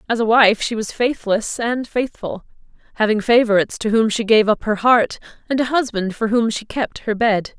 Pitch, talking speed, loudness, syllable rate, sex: 225 Hz, 205 wpm, -18 LUFS, 5.0 syllables/s, female